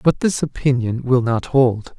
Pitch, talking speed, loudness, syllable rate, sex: 130 Hz, 180 wpm, -18 LUFS, 4.3 syllables/s, male